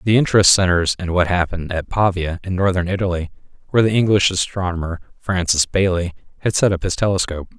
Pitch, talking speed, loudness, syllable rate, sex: 90 Hz, 175 wpm, -18 LUFS, 6.4 syllables/s, male